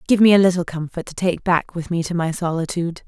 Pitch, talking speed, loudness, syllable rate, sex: 175 Hz, 255 wpm, -20 LUFS, 6.2 syllables/s, female